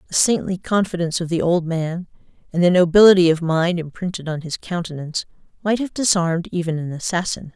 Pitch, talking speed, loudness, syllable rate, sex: 175 Hz, 175 wpm, -19 LUFS, 6.0 syllables/s, female